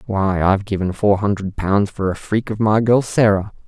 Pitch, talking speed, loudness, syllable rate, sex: 100 Hz, 210 wpm, -18 LUFS, 5.0 syllables/s, male